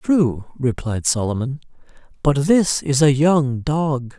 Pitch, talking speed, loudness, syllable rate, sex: 140 Hz, 130 wpm, -19 LUFS, 3.5 syllables/s, male